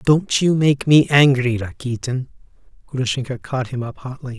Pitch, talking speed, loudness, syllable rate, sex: 130 Hz, 150 wpm, -18 LUFS, 4.6 syllables/s, male